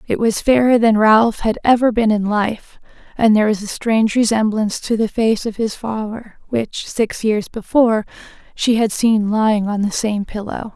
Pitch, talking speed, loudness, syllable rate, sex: 220 Hz, 190 wpm, -17 LUFS, 4.8 syllables/s, female